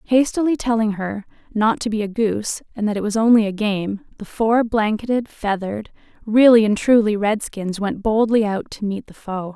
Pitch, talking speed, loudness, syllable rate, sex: 215 Hz, 190 wpm, -19 LUFS, 5.0 syllables/s, female